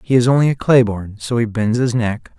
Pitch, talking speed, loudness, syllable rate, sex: 120 Hz, 275 wpm, -16 LUFS, 5.3 syllables/s, male